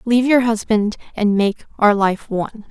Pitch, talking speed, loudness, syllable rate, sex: 215 Hz, 180 wpm, -17 LUFS, 4.8 syllables/s, female